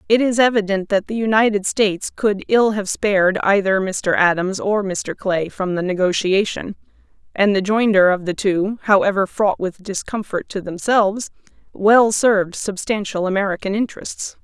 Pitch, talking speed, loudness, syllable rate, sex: 200 Hz, 155 wpm, -18 LUFS, 4.9 syllables/s, female